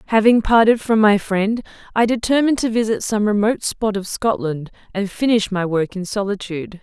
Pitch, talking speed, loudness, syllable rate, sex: 210 Hz, 175 wpm, -18 LUFS, 5.4 syllables/s, female